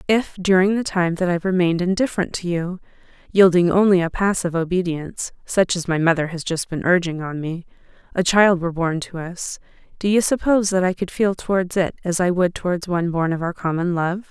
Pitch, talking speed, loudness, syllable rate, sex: 180 Hz, 210 wpm, -20 LUFS, 4.0 syllables/s, female